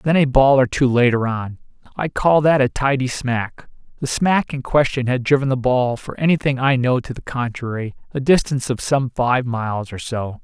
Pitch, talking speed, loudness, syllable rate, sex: 130 Hz, 205 wpm, -19 LUFS, 4.9 syllables/s, male